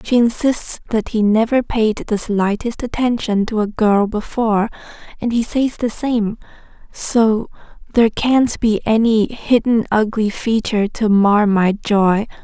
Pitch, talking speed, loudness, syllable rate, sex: 220 Hz, 145 wpm, -17 LUFS, 4.1 syllables/s, female